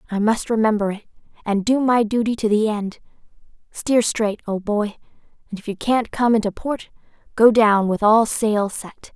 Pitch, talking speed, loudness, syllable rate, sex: 215 Hz, 185 wpm, -19 LUFS, 4.7 syllables/s, female